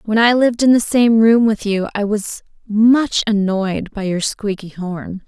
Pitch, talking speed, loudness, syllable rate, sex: 215 Hz, 195 wpm, -16 LUFS, 4.2 syllables/s, female